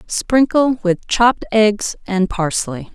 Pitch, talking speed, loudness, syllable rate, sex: 210 Hz, 120 wpm, -16 LUFS, 3.5 syllables/s, female